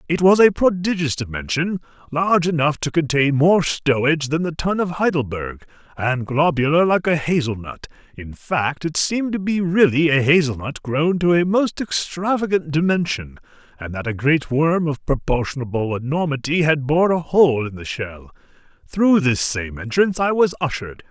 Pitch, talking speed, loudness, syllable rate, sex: 155 Hz, 170 wpm, -19 LUFS, 5.0 syllables/s, male